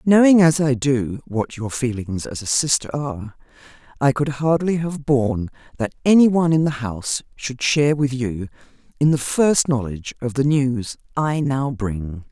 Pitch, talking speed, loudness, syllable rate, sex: 135 Hz, 175 wpm, -20 LUFS, 4.7 syllables/s, female